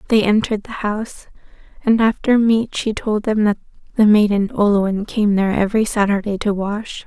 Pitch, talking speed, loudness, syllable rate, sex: 210 Hz, 170 wpm, -17 LUFS, 5.3 syllables/s, female